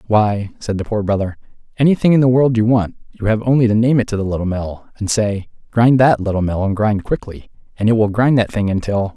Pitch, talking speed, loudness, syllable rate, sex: 110 Hz, 235 wpm, -16 LUFS, 5.8 syllables/s, male